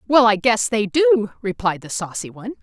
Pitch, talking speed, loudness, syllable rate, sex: 215 Hz, 205 wpm, -19 LUFS, 5.3 syllables/s, female